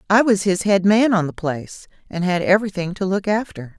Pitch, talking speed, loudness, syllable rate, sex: 195 Hz, 220 wpm, -19 LUFS, 5.7 syllables/s, female